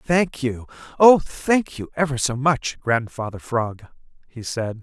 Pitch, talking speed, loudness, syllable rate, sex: 130 Hz, 150 wpm, -21 LUFS, 3.8 syllables/s, male